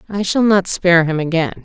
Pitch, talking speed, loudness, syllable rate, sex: 180 Hz, 220 wpm, -15 LUFS, 5.5 syllables/s, female